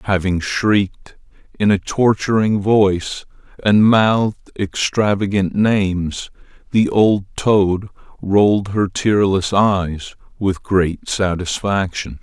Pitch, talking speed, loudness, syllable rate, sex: 100 Hz, 100 wpm, -17 LUFS, 3.5 syllables/s, male